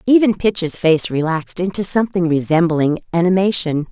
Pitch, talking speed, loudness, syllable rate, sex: 175 Hz, 125 wpm, -17 LUFS, 5.4 syllables/s, female